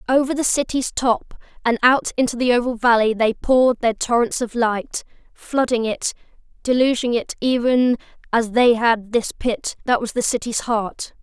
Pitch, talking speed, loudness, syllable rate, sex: 240 Hz, 165 wpm, -19 LUFS, 4.7 syllables/s, female